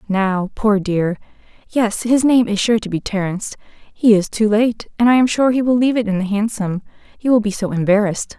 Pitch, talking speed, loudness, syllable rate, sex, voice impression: 215 Hz, 220 wpm, -17 LUFS, 4.5 syllables/s, female, very feminine, slightly young, slightly adult-like, thin, slightly tensed, weak, slightly bright, slightly hard, slightly clear, very fluent, slightly raspy, slightly cute, slightly cool, very intellectual, refreshing, sincere, very calm, very friendly, very reassuring, slightly unique, elegant, sweet, slightly lively, kind, modest